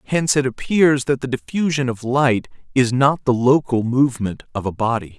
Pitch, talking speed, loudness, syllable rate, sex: 125 Hz, 185 wpm, -19 LUFS, 5.2 syllables/s, male